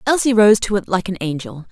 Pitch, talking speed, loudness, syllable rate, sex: 200 Hz, 245 wpm, -16 LUFS, 5.8 syllables/s, female